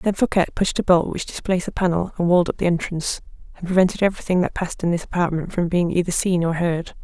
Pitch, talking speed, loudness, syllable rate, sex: 175 Hz, 240 wpm, -21 LUFS, 6.8 syllables/s, female